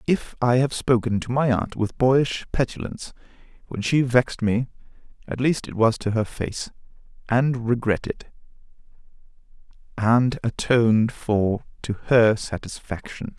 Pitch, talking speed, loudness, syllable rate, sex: 120 Hz, 130 wpm, -22 LUFS, 4.3 syllables/s, male